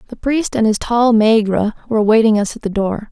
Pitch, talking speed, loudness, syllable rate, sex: 220 Hz, 230 wpm, -15 LUFS, 6.1 syllables/s, female